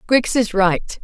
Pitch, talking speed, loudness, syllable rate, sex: 215 Hz, 175 wpm, -17 LUFS, 3.4 syllables/s, female